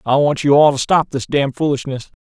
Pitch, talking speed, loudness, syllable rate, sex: 140 Hz, 245 wpm, -16 LUFS, 5.9 syllables/s, male